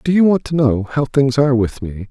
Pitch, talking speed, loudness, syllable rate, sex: 130 Hz, 255 wpm, -16 LUFS, 5.3 syllables/s, male